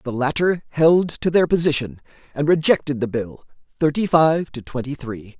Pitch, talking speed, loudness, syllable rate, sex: 145 Hz, 165 wpm, -20 LUFS, 4.9 syllables/s, male